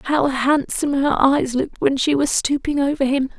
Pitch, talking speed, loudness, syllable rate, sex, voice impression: 275 Hz, 195 wpm, -19 LUFS, 5.1 syllables/s, female, feminine, adult-like, tensed, powerful, clear, fluent, intellectual, calm, elegant, slightly lively, strict, sharp